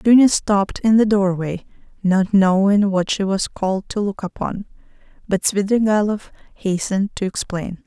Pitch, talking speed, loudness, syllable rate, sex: 200 Hz, 145 wpm, -19 LUFS, 4.7 syllables/s, female